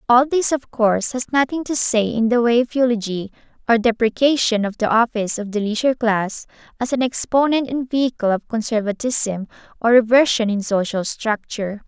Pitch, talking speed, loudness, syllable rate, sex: 230 Hz, 170 wpm, -19 LUFS, 5.4 syllables/s, female